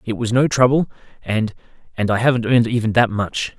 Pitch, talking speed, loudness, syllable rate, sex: 115 Hz, 185 wpm, -18 LUFS, 5.8 syllables/s, male